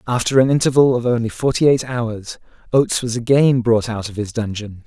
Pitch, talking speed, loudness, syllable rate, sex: 120 Hz, 195 wpm, -17 LUFS, 5.5 syllables/s, male